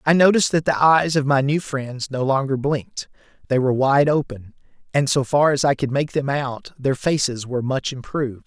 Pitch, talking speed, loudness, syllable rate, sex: 140 Hz, 215 wpm, -20 LUFS, 5.3 syllables/s, male